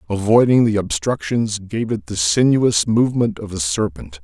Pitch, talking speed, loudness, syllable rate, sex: 105 Hz, 155 wpm, -18 LUFS, 4.7 syllables/s, male